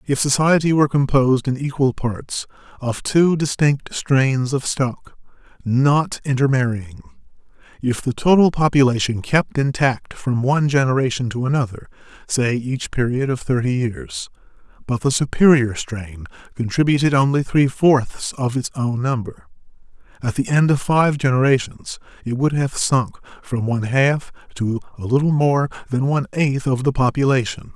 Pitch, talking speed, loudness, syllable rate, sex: 130 Hz, 145 wpm, -19 LUFS, 4.5 syllables/s, male